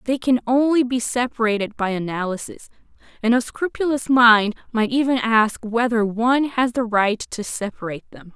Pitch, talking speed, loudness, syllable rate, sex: 235 Hz, 160 wpm, -20 LUFS, 5.0 syllables/s, female